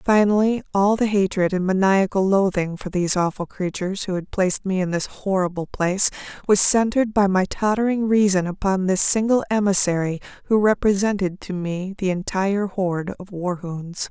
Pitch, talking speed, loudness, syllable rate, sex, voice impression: 190 Hz, 160 wpm, -21 LUFS, 5.3 syllables/s, female, feminine, adult-like, slightly relaxed, powerful, soft, raspy, calm, friendly, reassuring, elegant, slightly sharp